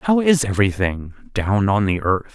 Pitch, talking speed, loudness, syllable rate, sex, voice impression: 110 Hz, 180 wpm, -19 LUFS, 4.6 syllables/s, male, masculine, adult-like, tensed, powerful, bright, clear, fluent, intellectual, calm, friendly, reassuring, lively, kind